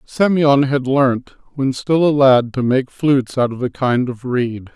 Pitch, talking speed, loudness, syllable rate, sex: 130 Hz, 200 wpm, -16 LUFS, 4.1 syllables/s, male